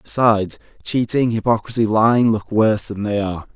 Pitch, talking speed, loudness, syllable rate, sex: 110 Hz, 150 wpm, -18 LUFS, 5.6 syllables/s, male